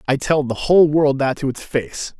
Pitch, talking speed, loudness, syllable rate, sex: 140 Hz, 245 wpm, -18 LUFS, 4.9 syllables/s, male